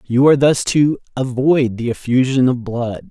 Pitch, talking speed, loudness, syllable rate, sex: 130 Hz, 175 wpm, -16 LUFS, 4.6 syllables/s, male